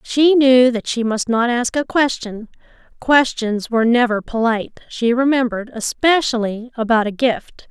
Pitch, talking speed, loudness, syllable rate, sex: 240 Hz, 150 wpm, -17 LUFS, 4.6 syllables/s, female